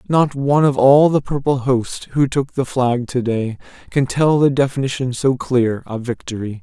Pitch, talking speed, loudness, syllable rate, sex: 130 Hz, 190 wpm, -17 LUFS, 4.6 syllables/s, male